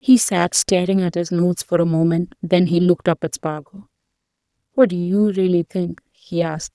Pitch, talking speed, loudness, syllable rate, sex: 180 Hz, 195 wpm, -19 LUFS, 5.2 syllables/s, female